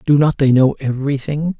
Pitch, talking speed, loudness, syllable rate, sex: 140 Hz, 190 wpm, -16 LUFS, 5.6 syllables/s, male